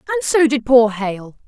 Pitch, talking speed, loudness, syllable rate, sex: 255 Hz, 205 wpm, -16 LUFS, 7.3 syllables/s, female